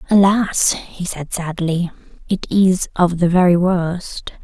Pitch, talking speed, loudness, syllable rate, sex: 180 Hz, 135 wpm, -17 LUFS, 3.6 syllables/s, female